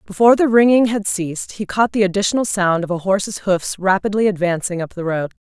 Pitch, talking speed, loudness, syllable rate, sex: 195 Hz, 210 wpm, -17 LUFS, 6.0 syllables/s, female